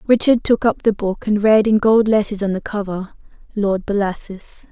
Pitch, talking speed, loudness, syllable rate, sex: 205 Hz, 190 wpm, -17 LUFS, 4.8 syllables/s, female